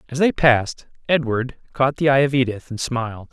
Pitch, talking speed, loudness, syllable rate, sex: 130 Hz, 200 wpm, -19 LUFS, 5.3 syllables/s, male